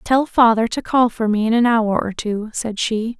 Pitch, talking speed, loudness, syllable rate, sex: 230 Hz, 245 wpm, -18 LUFS, 4.5 syllables/s, female